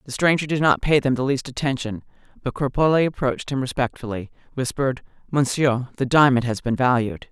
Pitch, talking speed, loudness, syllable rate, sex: 130 Hz, 170 wpm, -21 LUFS, 5.8 syllables/s, female